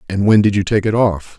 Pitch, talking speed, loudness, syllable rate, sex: 100 Hz, 305 wpm, -15 LUFS, 5.8 syllables/s, male